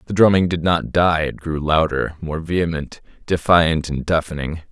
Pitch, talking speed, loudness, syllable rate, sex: 80 Hz, 165 wpm, -19 LUFS, 4.7 syllables/s, male